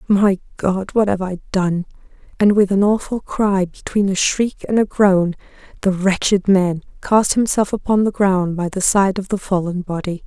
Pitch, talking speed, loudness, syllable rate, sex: 195 Hz, 185 wpm, -18 LUFS, 4.5 syllables/s, female